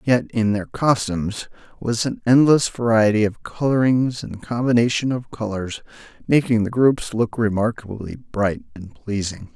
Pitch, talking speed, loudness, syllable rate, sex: 115 Hz, 140 wpm, -20 LUFS, 4.4 syllables/s, male